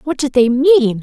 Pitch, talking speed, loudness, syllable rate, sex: 260 Hz, 235 wpm, -13 LUFS, 4.0 syllables/s, female